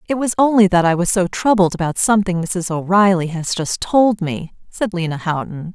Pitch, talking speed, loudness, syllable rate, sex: 185 Hz, 200 wpm, -17 LUFS, 5.2 syllables/s, female